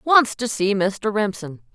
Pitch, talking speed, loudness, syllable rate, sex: 210 Hz, 170 wpm, -21 LUFS, 3.8 syllables/s, female